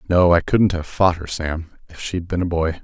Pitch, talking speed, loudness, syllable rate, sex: 85 Hz, 255 wpm, -20 LUFS, 4.8 syllables/s, male